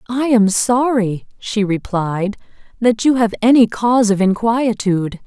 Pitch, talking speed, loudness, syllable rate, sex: 220 Hz, 135 wpm, -16 LUFS, 4.3 syllables/s, female